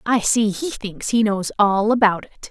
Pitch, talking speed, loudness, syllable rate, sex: 215 Hz, 215 wpm, -19 LUFS, 4.3 syllables/s, female